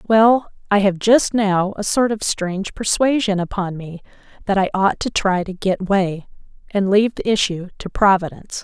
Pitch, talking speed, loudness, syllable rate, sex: 200 Hz, 180 wpm, -18 LUFS, 4.9 syllables/s, female